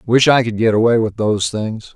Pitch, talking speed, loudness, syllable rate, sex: 115 Hz, 245 wpm, -16 LUFS, 5.2 syllables/s, male